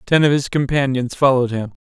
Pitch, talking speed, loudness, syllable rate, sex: 135 Hz, 195 wpm, -17 LUFS, 6.1 syllables/s, male